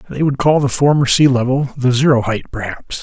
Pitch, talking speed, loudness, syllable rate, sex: 130 Hz, 200 wpm, -15 LUFS, 5.5 syllables/s, male